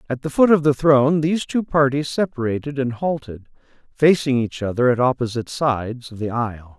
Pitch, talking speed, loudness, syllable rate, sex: 135 Hz, 185 wpm, -20 LUFS, 5.7 syllables/s, male